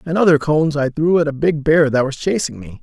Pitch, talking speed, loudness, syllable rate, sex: 150 Hz, 275 wpm, -16 LUFS, 5.9 syllables/s, male